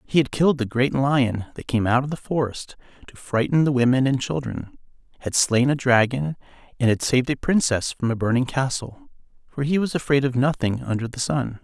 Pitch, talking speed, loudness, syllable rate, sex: 130 Hz, 205 wpm, -22 LUFS, 5.4 syllables/s, male